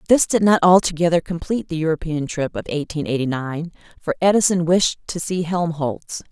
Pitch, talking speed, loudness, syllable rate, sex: 165 Hz, 170 wpm, -20 LUFS, 5.3 syllables/s, female